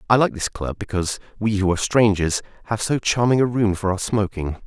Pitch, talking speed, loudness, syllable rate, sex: 105 Hz, 220 wpm, -21 LUFS, 5.8 syllables/s, male